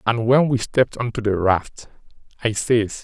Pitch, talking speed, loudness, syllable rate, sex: 115 Hz, 200 wpm, -20 LUFS, 4.6 syllables/s, male